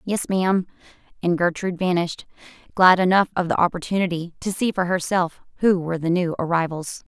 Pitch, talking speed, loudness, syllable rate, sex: 180 Hz, 160 wpm, -21 LUFS, 6.0 syllables/s, female